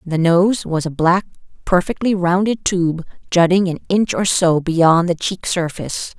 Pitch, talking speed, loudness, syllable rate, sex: 175 Hz, 165 wpm, -17 LUFS, 4.3 syllables/s, female